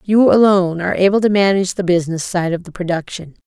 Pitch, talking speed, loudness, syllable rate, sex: 185 Hz, 210 wpm, -15 LUFS, 6.7 syllables/s, female